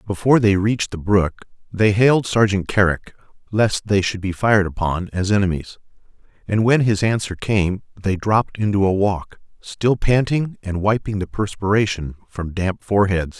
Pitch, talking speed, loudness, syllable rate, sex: 100 Hz, 160 wpm, -19 LUFS, 5.0 syllables/s, male